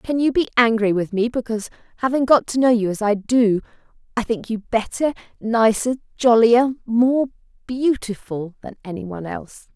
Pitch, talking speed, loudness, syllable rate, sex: 230 Hz, 165 wpm, -20 LUFS, 5.2 syllables/s, female